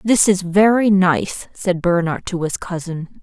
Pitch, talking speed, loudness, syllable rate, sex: 185 Hz, 165 wpm, -17 LUFS, 3.9 syllables/s, female